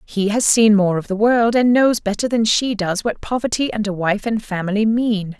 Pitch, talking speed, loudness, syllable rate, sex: 215 Hz, 235 wpm, -17 LUFS, 4.9 syllables/s, female